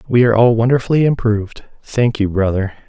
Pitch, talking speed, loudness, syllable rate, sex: 115 Hz, 165 wpm, -15 LUFS, 6.1 syllables/s, male